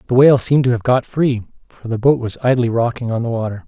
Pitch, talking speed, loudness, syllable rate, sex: 120 Hz, 260 wpm, -16 LUFS, 6.8 syllables/s, male